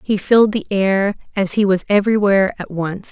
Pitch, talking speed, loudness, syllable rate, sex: 200 Hz, 195 wpm, -16 LUFS, 5.6 syllables/s, female